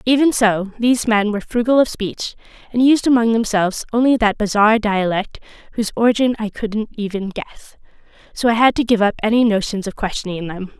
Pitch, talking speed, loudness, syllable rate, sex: 220 Hz, 185 wpm, -17 LUFS, 5.9 syllables/s, female